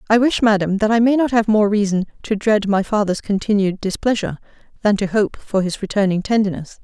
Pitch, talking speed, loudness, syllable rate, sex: 205 Hz, 200 wpm, -18 LUFS, 5.8 syllables/s, female